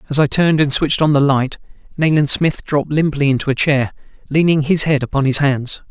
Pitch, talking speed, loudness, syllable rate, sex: 145 Hz, 215 wpm, -16 LUFS, 5.9 syllables/s, male